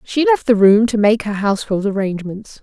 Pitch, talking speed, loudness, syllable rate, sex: 215 Hz, 205 wpm, -15 LUFS, 5.5 syllables/s, female